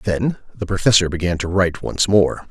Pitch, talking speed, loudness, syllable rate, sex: 95 Hz, 190 wpm, -18 LUFS, 5.3 syllables/s, male